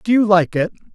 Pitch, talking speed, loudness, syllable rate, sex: 195 Hz, 255 wpm, -16 LUFS, 5.7 syllables/s, male